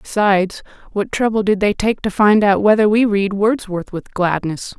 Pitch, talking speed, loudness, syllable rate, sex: 205 Hz, 190 wpm, -16 LUFS, 4.7 syllables/s, female